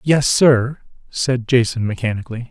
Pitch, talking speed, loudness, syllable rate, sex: 125 Hz, 120 wpm, -17 LUFS, 4.6 syllables/s, male